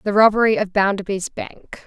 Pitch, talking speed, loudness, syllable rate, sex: 205 Hz, 160 wpm, -18 LUFS, 5.1 syllables/s, female